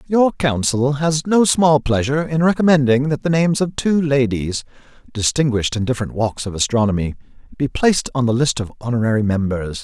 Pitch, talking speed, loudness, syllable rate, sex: 135 Hz, 170 wpm, -18 LUFS, 5.7 syllables/s, male